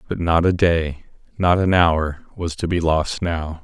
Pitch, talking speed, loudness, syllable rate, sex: 85 Hz, 200 wpm, -19 LUFS, 4.0 syllables/s, male